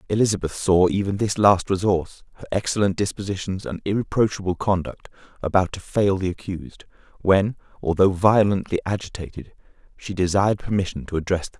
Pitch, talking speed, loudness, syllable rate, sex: 95 Hz, 145 wpm, -22 LUFS, 5.9 syllables/s, male